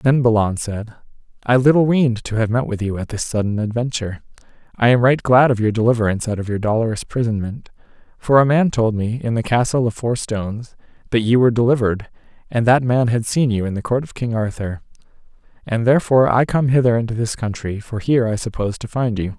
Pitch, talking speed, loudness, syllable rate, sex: 115 Hz, 215 wpm, -18 LUFS, 6.2 syllables/s, male